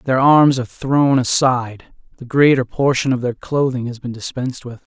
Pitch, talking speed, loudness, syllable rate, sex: 130 Hz, 180 wpm, -17 LUFS, 5.1 syllables/s, male